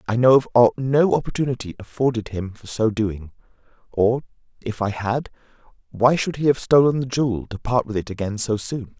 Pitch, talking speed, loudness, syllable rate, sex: 120 Hz, 185 wpm, -21 LUFS, 5.3 syllables/s, male